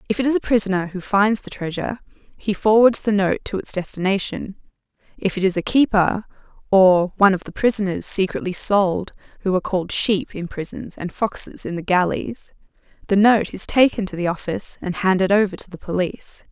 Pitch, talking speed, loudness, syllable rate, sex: 195 Hz, 190 wpm, -20 LUFS, 5.6 syllables/s, female